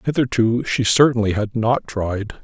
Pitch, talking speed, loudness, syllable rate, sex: 115 Hz, 150 wpm, -19 LUFS, 4.5 syllables/s, male